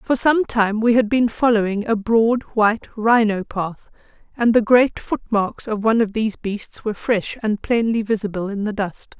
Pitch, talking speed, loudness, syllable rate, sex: 220 Hz, 190 wpm, -19 LUFS, 4.7 syllables/s, female